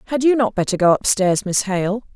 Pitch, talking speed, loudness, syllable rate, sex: 205 Hz, 225 wpm, -18 LUFS, 5.5 syllables/s, female